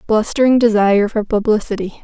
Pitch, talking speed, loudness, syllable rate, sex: 215 Hz, 120 wpm, -15 LUFS, 5.9 syllables/s, female